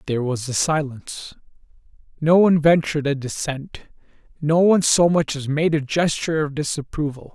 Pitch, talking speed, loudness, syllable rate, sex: 150 Hz, 155 wpm, -20 LUFS, 5.4 syllables/s, male